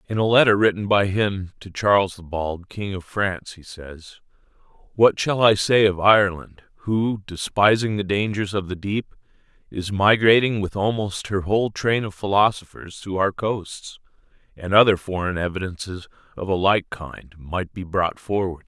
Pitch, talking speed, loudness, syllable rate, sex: 100 Hz, 165 wpm, -21 LUFS, 4.6 syllables/s, male